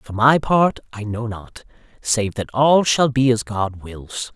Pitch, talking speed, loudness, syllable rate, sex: 115 Hz, 195 wpm, -19 LUFS, 3.7 syllables/s, male